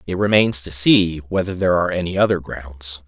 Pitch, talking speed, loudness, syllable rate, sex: 85 Hz, 195 wpm, -18 LUFS, 5.5 syllables/s, male